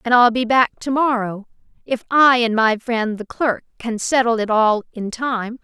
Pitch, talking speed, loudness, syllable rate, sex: 235 Hz, 200 wpm, -18 LUFS, 4.4 syllables/s, female